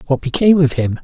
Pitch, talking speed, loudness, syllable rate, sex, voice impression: 145 Hz, 235 wpm, -14 LUFS, 7.1 syllables/s, male, masculine, adult-like, slightly relaxed, soft, fluent, calm, friendly, kind, slightly modest